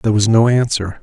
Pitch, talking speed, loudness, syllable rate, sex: 110 Hz, 235 wpm, -14 LUFS, 6.1 syllables/s, male